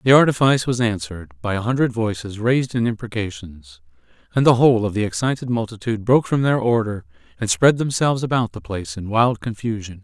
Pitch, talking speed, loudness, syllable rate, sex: 110 Hz, 185 wpm, -20 LUFS, 6.3 syllables/s, male